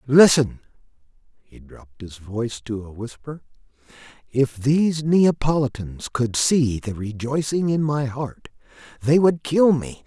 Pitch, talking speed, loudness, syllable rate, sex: 135 Hz, 130 wpm, -21 LUFS, 4.2 syllables/s, male